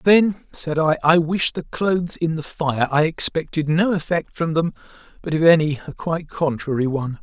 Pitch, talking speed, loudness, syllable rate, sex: 160 Hz, 190 wpm, -20 LUFS, 5.1 syllables/s, male